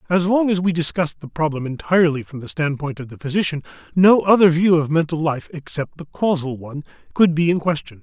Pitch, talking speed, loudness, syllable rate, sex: 160 Hz, 210 wpm, -19 LUFS, 6.0 syllables/s, male